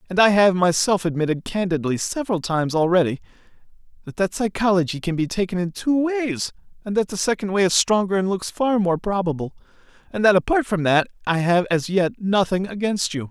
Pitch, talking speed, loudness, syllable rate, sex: 185 Hz, 190 wpm, -21 LUFS, 5.7 syllables/s, male